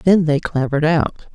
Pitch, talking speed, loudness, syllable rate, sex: 155 Hz, 180 wpm, -18 LUFS, 5.7 syllables/s, female